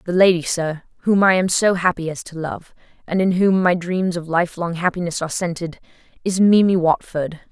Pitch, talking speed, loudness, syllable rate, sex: 175 Hz, 190 wpm, -19 LUFS, 5.2 syllables/s, female